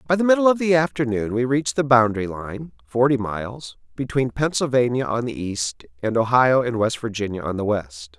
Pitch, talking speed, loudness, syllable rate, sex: 125 Hz, 190 wpm, -21 LUFS, 5.4 syllables/s, male